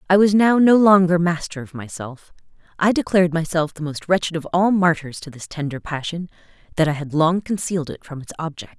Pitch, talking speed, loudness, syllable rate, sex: 165 Hz, 205 wpm, -19 LUFS, 5.7 syllables/s, female